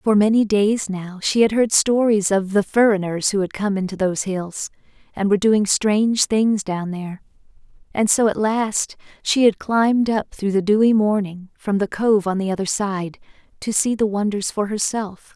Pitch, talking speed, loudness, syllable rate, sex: 205 Hz, 190 wpm, -19 LUFS, 4.8 syllables/s, female